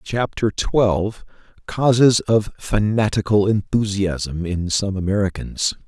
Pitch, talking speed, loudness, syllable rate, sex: 105 Hz, 90 wpm, -19 LUFS, 3.8 syllables/s, male